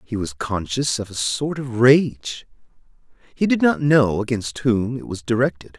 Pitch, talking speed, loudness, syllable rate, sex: 120 Hz, 175 wpm, -20 LUFS, 4.4 syllables/s, male